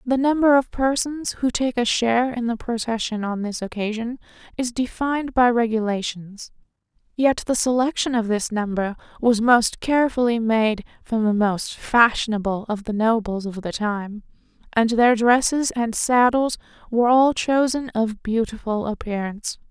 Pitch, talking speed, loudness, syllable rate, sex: 230 Hz, 150 wpm, -21 LUFS, 4.7 syllables/s, female